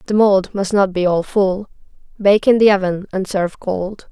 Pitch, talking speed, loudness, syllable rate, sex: 195 Hz, 205 wpm, -16 LUFS, 4.7 syllables/s, female